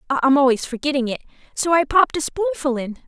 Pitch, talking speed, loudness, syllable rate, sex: 285 Hz, 195 wpm, -19 LUFS, 6.1 syllables/s, female